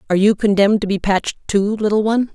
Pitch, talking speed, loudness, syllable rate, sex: 205 Hz, 230 wpm, -17 LUFS, 7.3 syllables/s, female